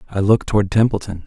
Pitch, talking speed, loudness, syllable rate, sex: 100 Hz, 190 wpm, -17 LUFS, 8.3 syllables/s, male